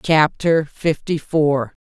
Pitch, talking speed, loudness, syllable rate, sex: 155 Hz, 100 wpm, -18 LUFS, 3.1 syllables/s, female